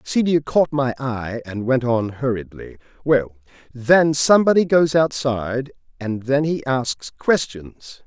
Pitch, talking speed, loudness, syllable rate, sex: 130 Hz, 135 wpm, -19 LUFS, 4.0 syllables/s, male